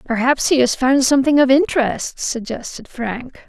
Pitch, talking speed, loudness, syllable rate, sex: 260 Hz, 155 wpm, -17 LUFS, 4.8 syllables/s, female